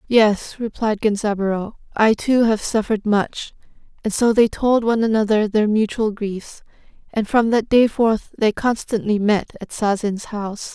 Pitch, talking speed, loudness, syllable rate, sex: 215 Hz, 155 wpm, -19 LUFS, 4.6 syllables/s, female